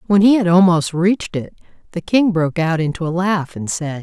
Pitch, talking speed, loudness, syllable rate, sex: 175 Hz, 225 wpm, -16 LUFS, 5.4 syllables/s, female